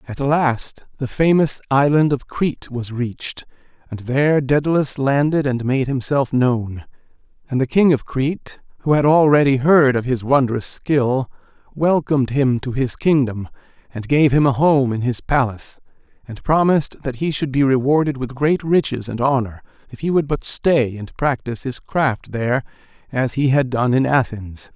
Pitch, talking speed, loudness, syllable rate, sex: 135 Hz, 170 wpm, -18 LUFS, 4.7 syllables/s, male